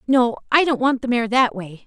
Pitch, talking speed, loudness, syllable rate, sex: 240 Hz, 255 wpm, -19 LUFS, 5.1 syllables/s, female